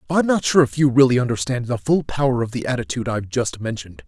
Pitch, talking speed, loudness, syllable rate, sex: 125 Hz, 235 wpm, -20 LUFS, 6.7 syllables/s, male